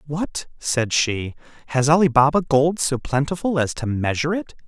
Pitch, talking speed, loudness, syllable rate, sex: 145 Hz, 165 wpm, -20 LUFS, 4.9 syllables/s, male